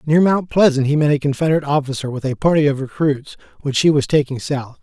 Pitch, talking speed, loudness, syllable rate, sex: 145 Hz, 225 wpm, -17 LUFS, 6.4 syllables/s, male